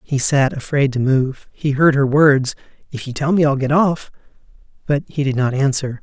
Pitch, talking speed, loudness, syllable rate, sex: 140 Hz, 210 wpm, -17 LUFS, 4.8 syllables/s, male